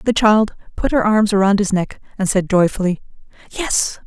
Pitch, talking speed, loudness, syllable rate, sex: 200 Hz, 175 wpm, -17 LUFS, 4.9 syllables/s, female